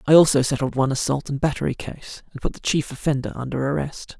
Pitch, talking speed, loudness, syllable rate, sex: 140 Hz, 215 wpm, -22 LUFS, 6.4 syllables/s, male